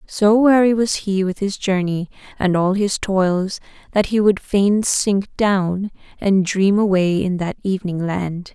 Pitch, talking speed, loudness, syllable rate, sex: 195 Hz, 170 wpm, -18 LUFS, 3.9 syllables/s, female